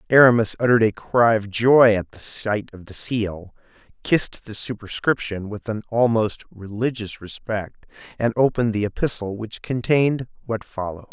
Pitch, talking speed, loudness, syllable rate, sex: 110 Hz, 150 wpm, -21 LUFS, 4.9 syllables/s, male